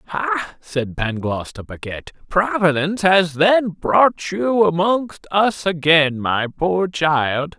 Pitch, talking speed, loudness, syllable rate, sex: 165 Hz, 125 wpm, -18 LUFS, 3.4 syllables/s, male